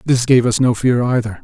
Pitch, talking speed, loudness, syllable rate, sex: 120 Hz, 250 wpm, -15 LUFS, 5.3 syllables/s, male